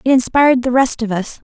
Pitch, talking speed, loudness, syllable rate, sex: 250 Hz, 240 wpm, -15 LUFS, 5.9 syllables/s, female